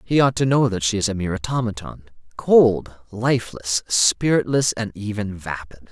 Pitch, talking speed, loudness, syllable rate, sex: 110 Hz, 160 wpm, -20 LUFS, 4.9 syllables/s, male